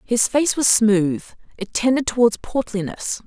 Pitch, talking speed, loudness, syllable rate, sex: 225 Hz, 145 wpm, -19 LUFS, 4.3 syllables/s, female